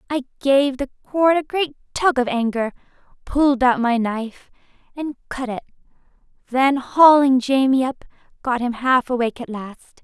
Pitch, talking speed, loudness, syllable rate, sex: 260 Hz, 155 wpm, -19 LUFS, 4.9 syllables/s, female